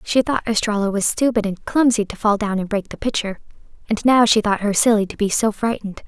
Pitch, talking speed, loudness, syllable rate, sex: 215 Hz, 235 wpm, -19 LUFS, 5.9 syllables/s, female